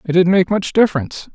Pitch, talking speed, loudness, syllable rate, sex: 180 Hz, 225 wpm, -15 LUFS, 6.5 syllables/s, male